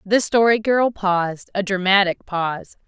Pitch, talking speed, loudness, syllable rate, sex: 200 Hz, 125 wpm, -19 LUFS, 4.5 syllables/s, female